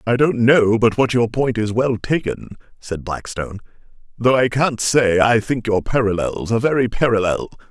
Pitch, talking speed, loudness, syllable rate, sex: 115 Hz, 180 wpm, -18 LUFS, 4.9 syllables/s, male